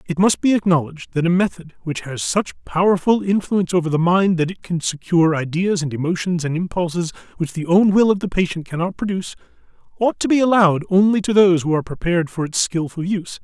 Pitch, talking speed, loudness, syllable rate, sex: 175 Hz, 210 wpm, -19 LUFS, 6.3 syllables/s, male